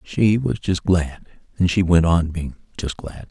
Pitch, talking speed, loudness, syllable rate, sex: 90 Hz, 200 wpm, -20 LUFS, 4.1 syllables/s, male